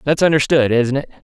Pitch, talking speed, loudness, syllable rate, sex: 140 Hz, 185 wpm, -16 LUFS, 6.0 syllables/s, male